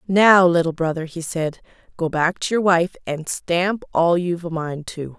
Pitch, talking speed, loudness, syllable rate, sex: 170 Hz, 195 wpm, -20 LUFS, 4.5 syllables/s, female